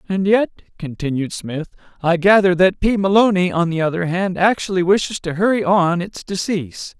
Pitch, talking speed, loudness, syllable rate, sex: 185 Hz, 170 wpm, -17 LUFS, 5.1 syllables/s, male